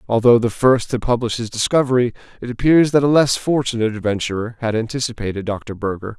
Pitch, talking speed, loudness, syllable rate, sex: 120 Hz, 175 wpm, -18 LUFS, 6.1 syllables/s, male